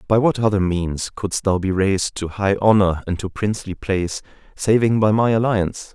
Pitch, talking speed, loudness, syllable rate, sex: 100 Hz, 190 wpm, -19 LUFS, 5.3 syllables/s, male